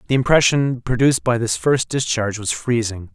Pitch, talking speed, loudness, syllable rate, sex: 120 Hz, 170 wpm, -18 LUFS, 5.4 syllables/s, male